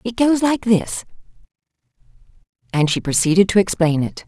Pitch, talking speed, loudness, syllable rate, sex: 200 Hz, 140 wpm, -18 LUFS, 5.2 syllables/s, female